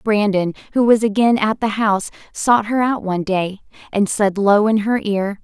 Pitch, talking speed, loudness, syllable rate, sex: 210 Hz, 200 wpm, -17 LUFS, 4.7 syllables/s, female